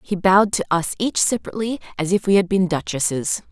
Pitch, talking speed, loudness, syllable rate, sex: 190 Hz, 205 wpm, -20 LUFS, 6.2 syllables/s, female